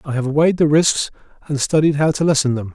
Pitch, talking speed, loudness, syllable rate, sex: 145 Hz, 240 wpm, -17 LUFS, 6.2 syllables/s, male